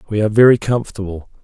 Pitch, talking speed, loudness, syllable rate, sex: 105 Hz, 170 wpm, -14 LUFS, 8.0 syllables/s, male